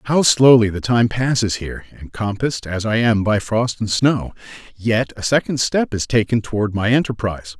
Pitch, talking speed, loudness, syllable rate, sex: 115 Hz, 180 wpm, -18 LUFS, 5.0 syllables/s, male